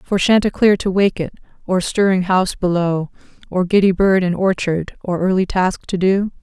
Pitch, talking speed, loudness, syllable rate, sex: 185 Hz, 180 wpm, -17 LUFS, 4.9 syllables/s, female